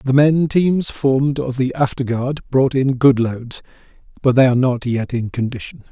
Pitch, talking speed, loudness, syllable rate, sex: 130 Hz, 195 wpm, -17 LUFS, 4.6 syllables/s, male